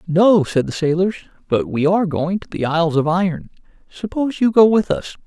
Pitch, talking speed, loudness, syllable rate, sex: 185 Hz, 205 wpm, -17 LUFS, 5.8 syllables/s, male